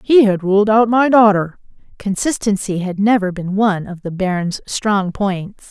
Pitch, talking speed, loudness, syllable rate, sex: 200 Hz, 170 wpm, -16 LUFS, 4.4 syllables/s, female